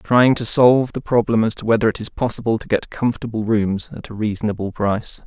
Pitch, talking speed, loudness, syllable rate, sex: 110 Hz, 215 wpm, -19 LUFS, 6.0 syllables/s, male